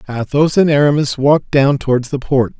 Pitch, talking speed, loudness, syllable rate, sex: 140 Hz, 185 wpm, -14 LUFS, 5.5 syllables/s, male